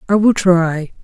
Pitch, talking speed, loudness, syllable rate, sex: 185 Hz, 175 wpm, -14 LUFS, 3.9 syllables/s, female